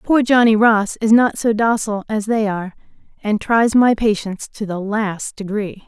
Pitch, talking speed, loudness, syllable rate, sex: 215 Hz, 185 wpm, -17 LUFS, 4.8 syllables/s, female